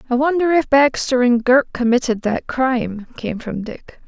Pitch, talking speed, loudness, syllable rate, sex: 250 Hz, 175 wpm, -17 LUFS, 4.6 syllables/s, female